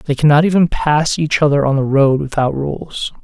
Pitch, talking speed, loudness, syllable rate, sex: 145 Hz, 205 wpm, -15 LUFS, 4.8 syllables/s, male